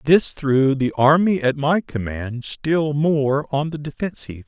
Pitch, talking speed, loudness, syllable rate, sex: 145 Hz, 160 wpm, -20 LUFS, 4.0 syllables/s, male